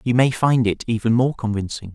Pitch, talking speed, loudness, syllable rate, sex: 115 Hz, 215 wpm, -20 LUFS, 5.5 syllables/s, male